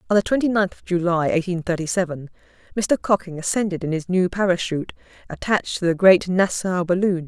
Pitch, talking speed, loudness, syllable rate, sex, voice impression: 180 Hz, 180 wpm, -21 LUFS, 5.9 syllables/s, female, feminine, adult-like, slightly cool, calm